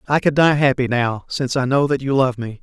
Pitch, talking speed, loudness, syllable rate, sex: 135 Hz, 275 wpm, -18 LUFS, 5.7 syllables/s, male